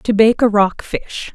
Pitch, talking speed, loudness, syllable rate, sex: 215 Hz, 225 wpm, -15 LUFS, 3.9 syllables/s, female